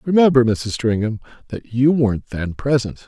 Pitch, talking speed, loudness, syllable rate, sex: 120 Hz, 155 wpm, -18 LUFS, 4.9 syllables/s, male